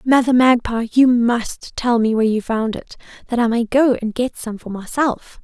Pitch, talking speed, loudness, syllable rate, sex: 235 Hz, 210 wpm, -18 LUFS, 4.7 syllables/s, female